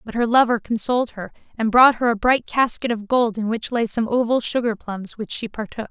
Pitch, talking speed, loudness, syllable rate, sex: 230 Hz, 225 wpm, -20 LUFS, 5.4 syllables/s, female